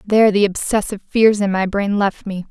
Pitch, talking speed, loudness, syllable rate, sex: 200 Hz, 215 wpm, -17 LUFS, 5.4 syllables/s, female